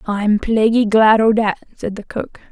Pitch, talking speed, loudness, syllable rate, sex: 215 Hz, 190 wpm, -15 LUFS, 4.3 syllables/s, female